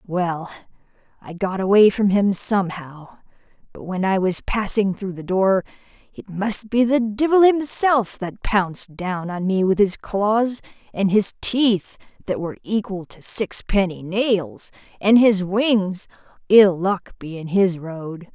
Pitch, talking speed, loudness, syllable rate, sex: 195 Hz, 150 wpm, -20 LUFS, 3.9 syllables/s, female